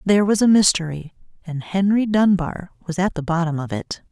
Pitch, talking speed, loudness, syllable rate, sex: 180 Hz, 190 wpm, -19 LUFS, 5.4 syllables/s, female